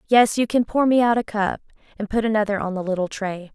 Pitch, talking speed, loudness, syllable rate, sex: 210 Hz, 235 wpm, -21 LUFS, 6.1 syllables/s, female